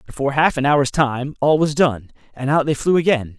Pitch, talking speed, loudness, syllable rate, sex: 140 Hz, 230 wpm, -18 LUFS, 5.2 syllables/s, male